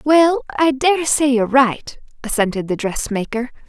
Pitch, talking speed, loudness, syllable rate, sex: 260 Hz, 145 wpm, -17 LUFS, 4.4 syllables/s, female